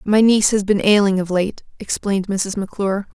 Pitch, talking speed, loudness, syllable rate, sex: 200 Hz, 190 wpm, -18 LUFS, 5.9 syllables/s, female